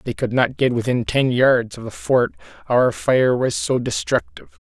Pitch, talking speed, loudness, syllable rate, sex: 125 Hz, 190 wpm, -19 LUFS, 4.6 syllables/s, male